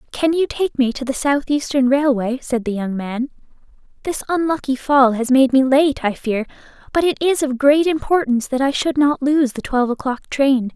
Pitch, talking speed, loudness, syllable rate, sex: 270 Hz, 200 wpm, -18 LUFS, 5.0 syllables/s, female